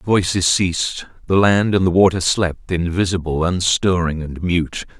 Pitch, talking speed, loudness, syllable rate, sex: 90 Hz, 155 wpm, -18 LUFS, 4.5 syllables/s, male